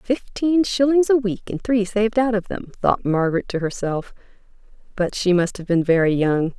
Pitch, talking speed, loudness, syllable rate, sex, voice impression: 205 Hz, 190 wpm, -20 LUFS, 5.0 syllables/s, female, feminine, slightly adult-like, muffled, calm, slightly reassuring, slightly kind